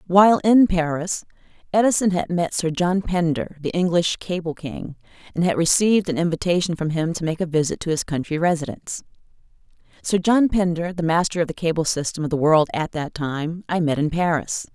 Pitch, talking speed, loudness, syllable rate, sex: 170 Hz, 190 wpm, -21 LUFS, 5.5 syllables/s, female